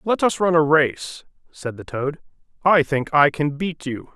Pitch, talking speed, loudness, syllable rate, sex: 150 Hz, 200 wpm, -20 LUFS, 4.2 syllables/s, male